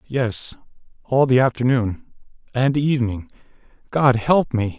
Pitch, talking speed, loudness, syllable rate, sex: 125 Hz, 75 wpm, -20 LUFS, 4.2 syllables/s, male